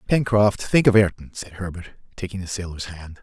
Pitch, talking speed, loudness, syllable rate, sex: 100 Hz, 185 wpm, -21 LUFS, 5.6 syllables/s, male